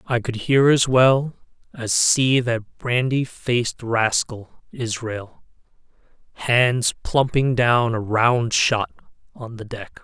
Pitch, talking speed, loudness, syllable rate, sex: 120 Hz, 125 wpm, -20 LUFS, 3.3 syllables/s, male